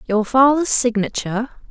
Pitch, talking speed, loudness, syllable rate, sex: 235 Hz, 105 wpm, -17 LUFS, 4.9 syllables/s, female